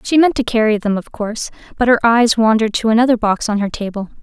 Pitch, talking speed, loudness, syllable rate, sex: 225 Hz, 240 wpm, -15 LUFS, 6.4 syllables/s, female